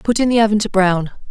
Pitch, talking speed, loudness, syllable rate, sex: 205 Hz, 275 wpm, -16 LUFS, 6.7 syllables/s, female